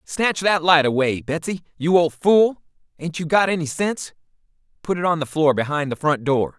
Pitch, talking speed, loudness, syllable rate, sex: 160 Hz, 200 wpm, -20 LUFS, 5.1 syllables/s, male